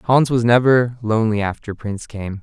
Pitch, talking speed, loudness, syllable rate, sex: 115 Hz, 175 wpm, -18 LUFS, 5.1 syllables/s, male